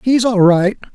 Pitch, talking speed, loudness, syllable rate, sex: 215 Hz, 190 wpm, -13 LUFS, 4.2 syllables/s, male